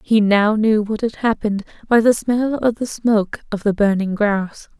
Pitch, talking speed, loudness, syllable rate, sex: 215 Hz, 200 wpm, -18 LUFS, 4.7 syllables/s, female